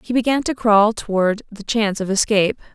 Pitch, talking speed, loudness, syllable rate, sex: 215 Hz, 195 wpm, -18 LUFS, 5.7 syllables/s, female